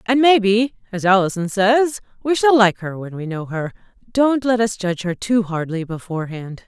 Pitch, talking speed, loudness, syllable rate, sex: 205 Hz, 190 wpm, -18 LUFS, 5.0 syllables/s, female